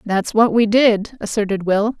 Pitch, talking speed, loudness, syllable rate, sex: 215 Hz, 180 wpm, -17 LUFS, 4.3 syllables/s, female